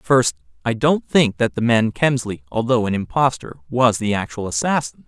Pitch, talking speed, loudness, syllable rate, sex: 120 Hz, 175 wpm, -19 LUFS, 4.8 syllables/s, male